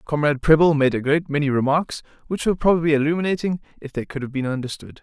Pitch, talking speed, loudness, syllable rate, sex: 150 Hz, 205 wpm, -21 LUFS, 7.0 syllables/s, male